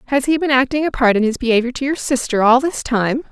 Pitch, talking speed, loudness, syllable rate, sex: 255 Hz, 270 wpm, -16 LUFS, 6.2 syllables/s, female